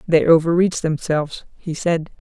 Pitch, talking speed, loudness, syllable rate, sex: 165 Hz, 135 wpm, -18 LUFS, 5.3 syllables/s, female